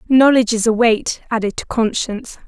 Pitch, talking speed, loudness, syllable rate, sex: 230 Hz, 170 wpm, -16 LUFS, 5.6 syllables/s, female